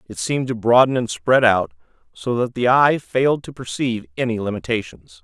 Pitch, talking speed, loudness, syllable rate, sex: 115 Hz, 185 wpm, -19 LUFS, 5.6 syllables/s, male